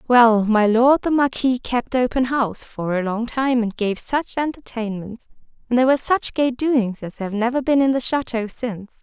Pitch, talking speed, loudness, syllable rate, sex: 240 Hz, 200 wpm, -20 LUFS, 4.9 syllables/s, female